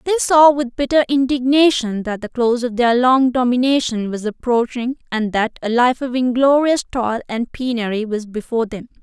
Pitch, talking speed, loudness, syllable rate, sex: 245 Hz, 175 wpm, -17 LUFS, 5.1 syllables/s, female